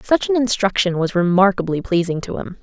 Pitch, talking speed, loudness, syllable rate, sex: 195 Hz, 185 wpm, -18 LUFS, 5.6 syllables/s, female